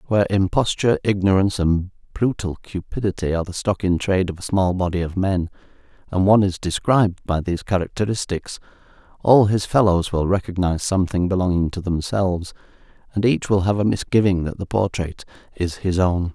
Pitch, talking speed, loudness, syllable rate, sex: 95 Hz, 165 wpm, -20 LUFS, 5.7 syllables/s, male